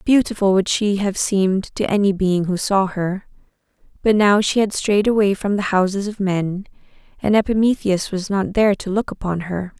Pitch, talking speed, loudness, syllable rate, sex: 200 Hz, 190 wpm, -19 LUFS, 5.0 syllables/s, female